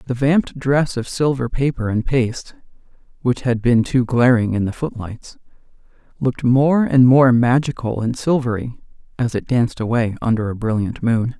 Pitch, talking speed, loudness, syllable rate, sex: 125 Hz, 165 wpm, -18 LUFS, 4.9 syllables/s, male